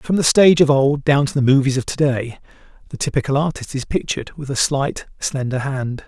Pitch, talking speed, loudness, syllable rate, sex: 140 Hz, 205 wpm, -18 LUFS, 5.6 syllables/s, male